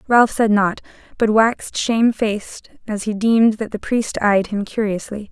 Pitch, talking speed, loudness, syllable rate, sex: 215 Hz, 170 wpm, -18 LUFS, 4.8 syllables/s, female